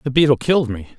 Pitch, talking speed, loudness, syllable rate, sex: 130 Hz, 245 wpm, -17 LUFS, 7.5 syllables/s, male